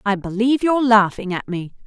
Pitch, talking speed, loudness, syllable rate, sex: 215 Hz, 195 wpm, -18 LUFS, 6.0 syllables/s, female